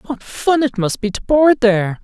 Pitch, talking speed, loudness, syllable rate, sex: 240 Hz, 235 wpm, -15 LUFS, 4.5 syllables/s, male